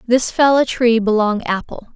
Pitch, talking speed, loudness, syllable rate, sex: 235 Hz, 155 wpm, -16 LUFS, 4.6 syllables/s, female